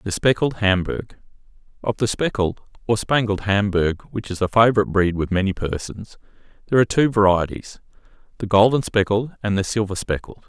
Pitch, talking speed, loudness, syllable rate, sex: 105 Hz, 150 wpm, -20 LUFS, 5.5 syllables/s, male